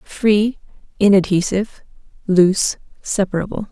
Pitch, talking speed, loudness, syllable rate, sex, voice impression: 195 Hz, 65 wpm, -17 LUFS, 4.9 syllables/s, female, feminine, adult-like, slightly relaxed, powerful, slightly dark, clear, slightly halting, intellectual, calm, slightly friendly, elegant, lively